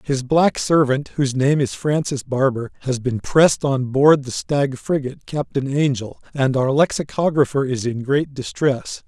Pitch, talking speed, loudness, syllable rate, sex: 135 Hz, 165 wpm, -19 LUFS, 4.5 syllables/s, male